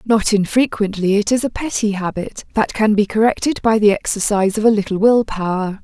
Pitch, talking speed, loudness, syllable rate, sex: 210 Hz, 195 wpm, -17 LUFS, 5.5 syllables/s, female